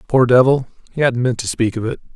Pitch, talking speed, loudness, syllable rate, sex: 125 Hz, 225 wpm, -17 LUFS, 6.3 syllables/s, male